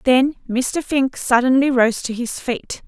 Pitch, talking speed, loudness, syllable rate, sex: 255 Hz, 165 wpm, -19 LUFS, 3.9 syllables/s, female